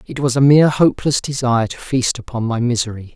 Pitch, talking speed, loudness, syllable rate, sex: 125 Hz, 210 wpm, -16 LUFS, 6.3 syllables/s, male